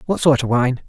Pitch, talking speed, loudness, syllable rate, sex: 130 Hz, 275 wpm, -17 LUFS, 5.6 syllables/s, male